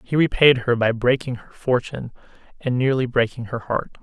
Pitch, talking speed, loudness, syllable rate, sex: 125 Hz, 180 wpm, -21 LUFS, 5.3 syllables/s, male